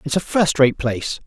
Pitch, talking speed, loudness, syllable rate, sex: 145 Hz, 235 wpm, -18 LUFS, 5.4 syllables/s, male